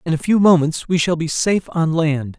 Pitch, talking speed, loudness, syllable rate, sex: 165 Hz, 250 wpm, -17 LUFS, 5.5 syllables/s, male